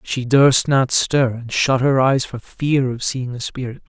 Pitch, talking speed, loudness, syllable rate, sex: 130 Hz, 215 wpm, -18 LUFS, 4.0 syllables/s, male